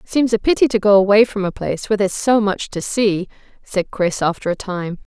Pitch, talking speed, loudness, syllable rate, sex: 205 Hz, 235 wpm, -17 LUFS, 5.7 syllables/s, female